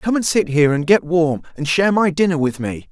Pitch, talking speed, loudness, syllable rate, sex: 165 Hz, 265 wpm, -17 LUFS, 5.9 syllables/s, male